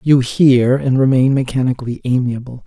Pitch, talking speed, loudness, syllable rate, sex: 130 Hz, 135 wpm, -15 LUFS, 5.1 syllables/s, male